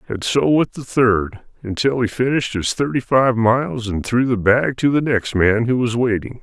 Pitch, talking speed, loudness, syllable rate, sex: 120 Hz, 215 wpm, -18 LUFS, 4.8 syllables/s, male